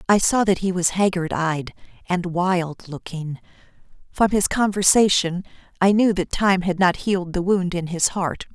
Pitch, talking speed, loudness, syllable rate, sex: 185 Hz, 175 wpm, -20 LUFS, 4.5 syllables/s, female